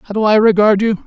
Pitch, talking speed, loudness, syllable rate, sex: 210 Hz, 280 wpm, -12 LUFS, 5.8 syllables/s, male